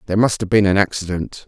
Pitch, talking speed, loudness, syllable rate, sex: 100 Hz, 245 wpm, -18 LUFS, 7.0 syllables/s, male